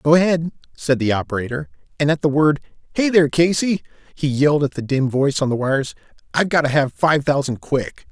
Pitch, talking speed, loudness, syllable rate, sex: 140 Hz, 190 wpm, -19 LUFS, 6.0 syllables/s, male